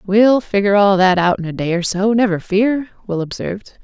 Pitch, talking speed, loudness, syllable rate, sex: 200 Hz, 220 wpm, -16 LUFS, 5.4 syllables/s, female